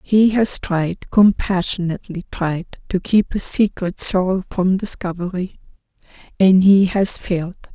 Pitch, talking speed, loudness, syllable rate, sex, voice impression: 185 Hz, 125 wpm, -18 LUFS, 4.3 syllables/s, female, feminine, adult-like, slightly weak, slightly halting, calm, reassuring, modest